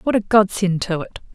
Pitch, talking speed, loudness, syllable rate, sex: 195 Hz, 225 wpm, -18 LUFS, 5.3 syllables/s, female